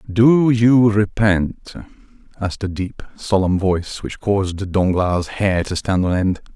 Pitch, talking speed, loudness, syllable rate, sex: 100 Hz, 145 wpm, -18 LUFS, 4.0 syllables/s, male